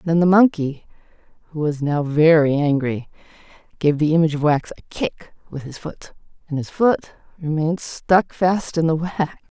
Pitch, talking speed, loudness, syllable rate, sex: 155 Hz, 170 wpm, -19 LUFS, 4.9 syllables/s, female